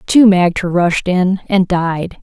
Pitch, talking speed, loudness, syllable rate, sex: 185 Hz, 160 wpm, -14 LUFS, 3.4 syllables/s, female